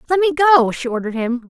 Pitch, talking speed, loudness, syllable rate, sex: 275 Hz, 240 wpm, -16 LUFS, 7.9 syllables/s, female